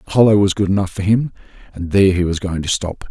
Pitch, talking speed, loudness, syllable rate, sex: 95 Hz, 270 wpm, -16 LUFS, 6.8 syllables/s, male